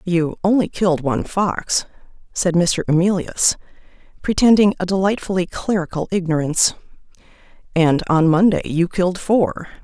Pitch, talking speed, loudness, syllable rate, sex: 180 Hz, 115 wpm, -18 LUFS, 4.9 syllables/s, female